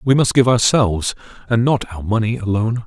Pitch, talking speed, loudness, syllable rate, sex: 110 Hz, 190 wpm, -17 LUFS, 5.6 syllables/s, male